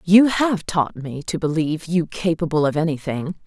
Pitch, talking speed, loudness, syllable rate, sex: 165 Hz, 175 wpm, -21 LUFS, 4.8 syllables/s, female